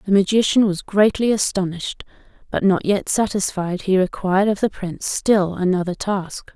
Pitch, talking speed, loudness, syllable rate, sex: 195 Hz, 155 wpm, -19 LUFS, 5.1 syllables/s, female